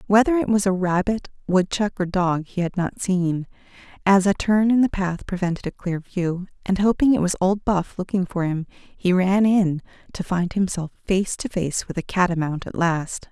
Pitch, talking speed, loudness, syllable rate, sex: 185 Hz, 205 wpm, -22 LUFS, 4.8 syllables/s, female